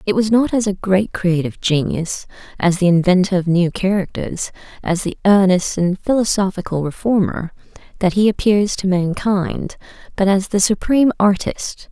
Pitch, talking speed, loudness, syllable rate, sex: 190 Hz, 150 wpm, -17 LUFS, 4.8 syllables/s, female